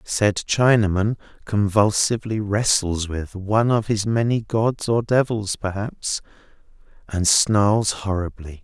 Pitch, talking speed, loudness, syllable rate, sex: 105 Hz, 110 wpm, -21 LUFS, 3.9 syllables/s, male